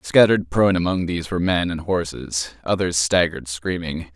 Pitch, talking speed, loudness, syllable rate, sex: 85 Hz, 160 wpm, -21 LUFS, 5.6 syllables/s, male